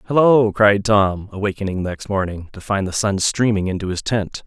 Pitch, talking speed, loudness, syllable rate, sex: 100 Hz, 200 wpm, -18 LUFS, 5.2 syllables/s, male